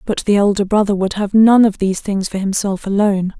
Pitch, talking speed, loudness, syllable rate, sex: 200 Hz, 230 wpm, -15 LUFS, 5.9 syllables/s, female